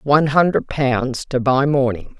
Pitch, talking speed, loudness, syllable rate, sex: 135 Hz, 165 wpm, -18 LUFS, 4.2 syllables/s, female